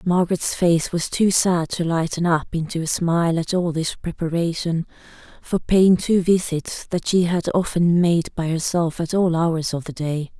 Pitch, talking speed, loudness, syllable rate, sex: 170 Hz, 185 wpm, -21 LUFS, 4.5 syllables/s, female